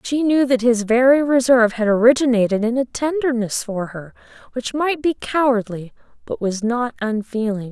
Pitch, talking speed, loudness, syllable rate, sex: 240 Hz, 165 wpm, -18 LUFS, 5.0 syllables/s, female